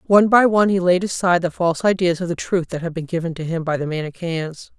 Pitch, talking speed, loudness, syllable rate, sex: 175 Hz, 265 wpm, -19 LUFS, 6.5 syllables/s, female